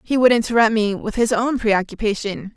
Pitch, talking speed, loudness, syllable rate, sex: 225 Hz, 190 wpm, -19 LUFS, 5.3 syllables/s, female